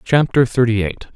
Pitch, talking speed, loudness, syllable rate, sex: 120 Hz, 155 wpm, -16 LUFS, 5.0 syllables/s, male